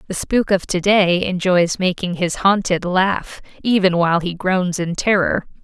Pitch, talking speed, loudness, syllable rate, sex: 185 Hz, 170 wpm, -18 LUFS, 4.3 syllables/s, female